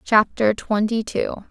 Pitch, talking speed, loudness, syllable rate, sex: 220 Hz, 120 wpm, -21 LUFS, 3.6 syllables/s, female